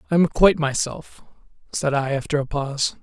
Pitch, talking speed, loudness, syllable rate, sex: 145 Hz, 180 wpm, -21 LUFS, 5.7 syllables/s, male